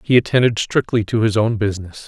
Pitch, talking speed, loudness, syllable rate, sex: 110 Hz, 205 wpm, -17 LUFS, 6.1 syllables/s, male